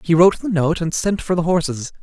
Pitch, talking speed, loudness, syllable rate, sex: 170 Hz, 265 wpm, -18 LUFS, 6.0 syllables/s, male